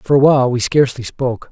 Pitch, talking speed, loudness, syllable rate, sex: 130 Hz, 240 wpm, -15 LUFS, 6.8 syllables/s, male